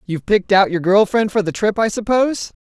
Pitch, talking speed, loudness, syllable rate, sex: 205 Hz, 250 wpm, -16 LUFS, 6.1 syllables/s, female